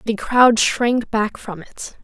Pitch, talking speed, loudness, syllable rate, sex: 225 Hz, 175 wpm, -17 LUFS, 3.2 syllables/s, female